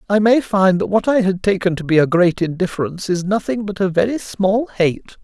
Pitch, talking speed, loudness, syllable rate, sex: 195 Hz, 230 wpm, -17 LUFS, 5.6 syllables/s, male